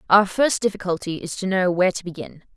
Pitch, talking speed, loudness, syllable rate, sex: 185 Hz, 210 wpm, -21 LUFS, 6.2 syllables/s, female